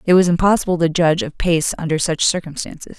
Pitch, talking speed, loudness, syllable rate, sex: 170 Hz, 200 wpm, -17 LUFS, 6.3 syllables/s, female